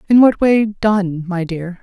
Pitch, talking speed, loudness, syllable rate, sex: 195 Hz, 195 wpm, -15 LUFS, 3.7 syllables/s, female